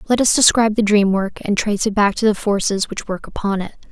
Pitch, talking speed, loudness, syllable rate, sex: 210 Hz, 260 wpm, -17 LUFS, 6.1 syllables/s, female